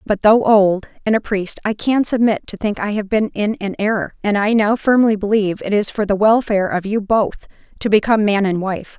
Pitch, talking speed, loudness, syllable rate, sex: 210 Hz, 235 wpm, -17 LUFS, 5.5 syllables/s, female